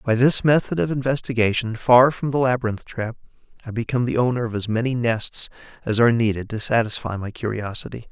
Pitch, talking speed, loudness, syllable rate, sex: 120 Hz, 185 wpm, -21 LUFS, 6.0 syllables/s, male